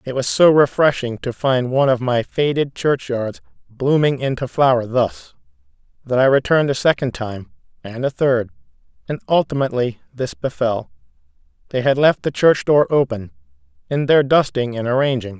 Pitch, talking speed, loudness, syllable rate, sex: 130 Hz, 155 wpm, -18 LUFS, 5.1 syllables/s, male